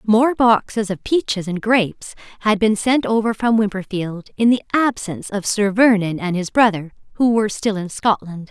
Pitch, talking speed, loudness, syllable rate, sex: 210 Hz, 185 wpm, -18 LUFS, 5.0 syllables/s, female